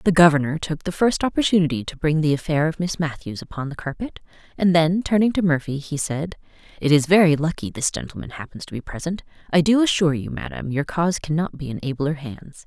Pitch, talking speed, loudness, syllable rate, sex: 160 Hz, 215 wpm, -21 LUFS, 6.0 syllables/s, female